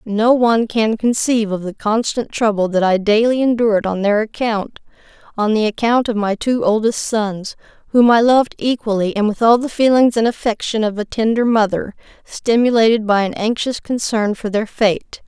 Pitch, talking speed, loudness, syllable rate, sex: 220 Hz, 175 wpm, -16 LUFS, 5.0 syllables/s, female